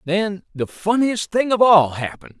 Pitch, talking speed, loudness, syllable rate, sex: 185 Hz, 175 wpm, -18 LUFS, 4.7 syllables/s, male